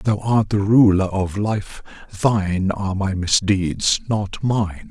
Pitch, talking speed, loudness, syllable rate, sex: 100 Hz, 160 wpm, -19 LUFS, 3.9 syllables/s, male